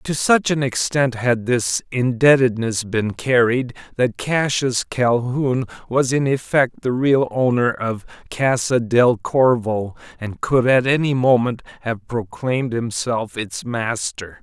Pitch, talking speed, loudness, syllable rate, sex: 125 Hz, 135 wpm, -19 LUFS, 3.8 syllables/s, male